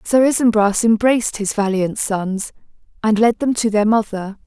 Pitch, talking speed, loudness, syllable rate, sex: 215 Hz, 160 wpm, -17 LUFS, 4.7 syllables/s, female